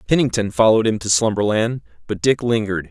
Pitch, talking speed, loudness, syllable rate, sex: 110 Hz, 165 wpm, -18 LUFS, 6.5 syllables/s, male